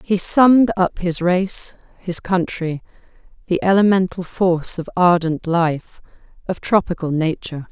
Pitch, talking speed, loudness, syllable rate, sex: 180 Hz, 125 wpm, -18 LUFS, 4.4 syllables/s, female